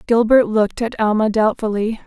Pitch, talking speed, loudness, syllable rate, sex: 220 Hz, 145 wpm, -17 LUFS, 5.4 syllables/s, female